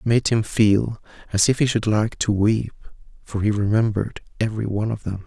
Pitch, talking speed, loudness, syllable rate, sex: 110 Hz, 205 wpm, -21 LUFS, 5.6 syllables/s, male